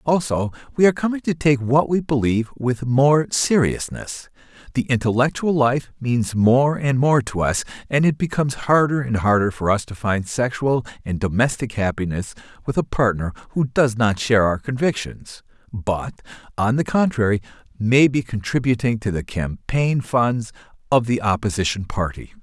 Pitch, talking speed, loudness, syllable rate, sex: 125 Hz, 160 wpm, -20 LUFS, 4.9 syllables/s, male